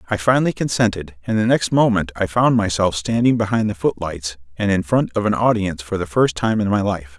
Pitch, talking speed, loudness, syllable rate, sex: 100 Hz, 225 wpm, -19 LUFS, 5.7 syllables/s, male